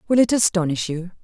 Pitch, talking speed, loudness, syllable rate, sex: 190 Hz, 195 wpm, -20 LUFS, 6.3 syllables/s, female